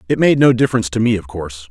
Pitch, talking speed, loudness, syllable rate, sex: 125 Hz, 280 wpm, -15 LUFS, 8.0 syllables/s, male